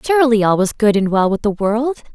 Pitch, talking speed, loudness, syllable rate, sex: 225 Hz, 250 wpm, -16 LUFS, 5.7 syllables/s, female